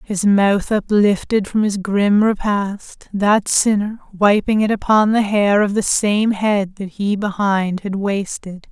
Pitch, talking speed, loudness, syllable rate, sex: 205 Hz, 160 wpm, -17 LUFS, 3.7 syllables/s, female